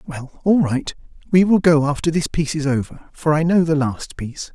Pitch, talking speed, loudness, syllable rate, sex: 155 Hz, 225 wpm, -19 LUFS, 5.3 syllables/s, male